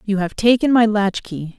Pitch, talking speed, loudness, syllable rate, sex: 210 Hz, 190 wpm, -17 LUFS, 4.7 syllables/s, female